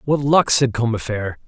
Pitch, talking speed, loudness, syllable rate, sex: 120 Hz, 165 wpm, -18 LUFS, 5.5 syllables/s, male